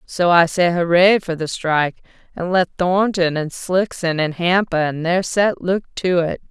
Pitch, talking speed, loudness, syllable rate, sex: 175 Hz, 185 wpm, -18 LUFS, 4.3 syllables/s, female